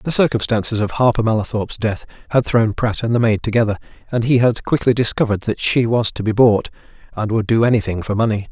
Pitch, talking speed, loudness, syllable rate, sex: 115 Hz, 210 wpm, -17 LUFS, 6.2 syllables/s, male